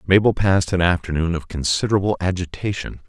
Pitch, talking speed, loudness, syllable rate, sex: 90 Hz, 135 wpm, -20 LUFS, 6.2 syllables/s, male